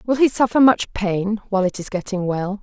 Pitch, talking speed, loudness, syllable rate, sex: 205 Hz, 230 wpm, -19 LUFS, 5.4 syllables/s, female